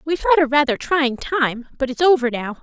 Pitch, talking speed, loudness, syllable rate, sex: 280 Hz, 230 wpm, -18 LUFS, 5.5 syllables/s, female